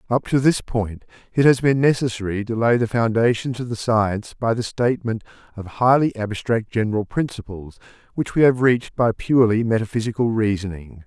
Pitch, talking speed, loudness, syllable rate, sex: 115 Hz, 170 wpm, -20 LUFS, 5.5 syllables/s, male